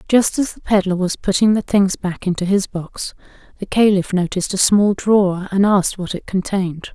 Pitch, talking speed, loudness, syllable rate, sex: 190 Hz, 200 wpm, -17 LUFS, 5.3 syllables/s, female